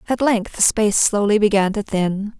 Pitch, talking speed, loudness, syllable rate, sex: 205 Hz, 200 wpm, -18 LUFS, 5.0 syllables/s, female